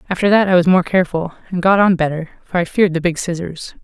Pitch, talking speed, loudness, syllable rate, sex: 175 Hz, 250 wpm, -16 LUFS, 6.6 syllables/s, female